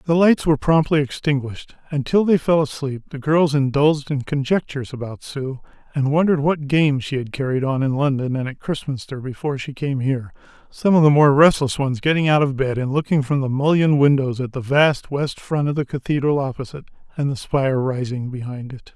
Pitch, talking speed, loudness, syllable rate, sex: 140 Hz, 205 wpm, -20 LUFS, 5.7 syllables/s, male